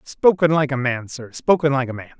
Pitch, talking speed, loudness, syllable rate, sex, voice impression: 140 Hz, 245 wpm, -19 LUFS, 5.4 syllables/s, male, masculine, adult-like, slightly soft, slightly muffled, sincere, calm, slightly mature